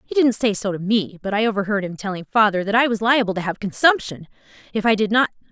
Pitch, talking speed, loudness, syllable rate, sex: 210 Hz, 250 wpm, -20 LUFS, 6.5 syllables/s, female